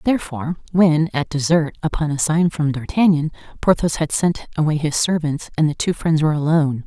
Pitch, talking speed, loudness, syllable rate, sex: 155 Hz, 185 wpm, -19 LUFS, 5.6 syllables/s, female